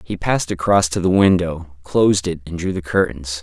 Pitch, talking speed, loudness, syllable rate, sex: 85 Hz, 210 wpm, -18 LUFS, 5.2 syllables/s, male